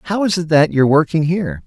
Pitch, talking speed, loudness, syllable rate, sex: 160 Hz, 250 wpm, -15 LUFS, 6.2 syllables/s, male